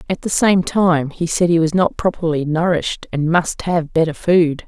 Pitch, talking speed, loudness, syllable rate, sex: 165 Hz, 205 wpm, -17 LUFS, 4.7 syllables/s, female